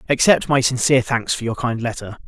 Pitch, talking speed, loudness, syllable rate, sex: 125 Hz, 210 wpm, -18 LUFS, 5.9 syllables/s, male